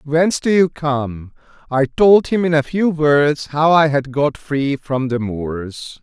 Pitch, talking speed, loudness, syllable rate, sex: 145 Hz, 190 wpm, -17 LUFS, 3.6 syllables/s, male